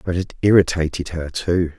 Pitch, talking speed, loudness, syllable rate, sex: 85 Hz, 170 wpm, -19 LUFS, 5.1 syllables/s, male